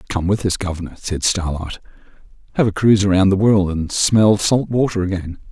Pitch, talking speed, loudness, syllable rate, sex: 95 Hz, 185 wpm, -17 LUFS, 5.2 syllables/s, male